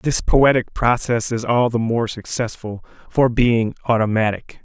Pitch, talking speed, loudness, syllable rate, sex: 115 Hz, 140 wpm, -19 LUFS, 4.2 syllables/s, male